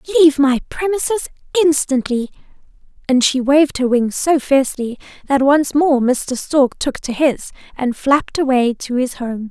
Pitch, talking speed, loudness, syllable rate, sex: 275 Hz, 160 wpm, -16 LUFS, 4.9 syllables/s, female